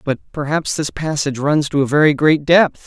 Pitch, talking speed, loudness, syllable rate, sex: 150 Hz, 210 wpm, -16 LUFS, 5.3 syllables/s, male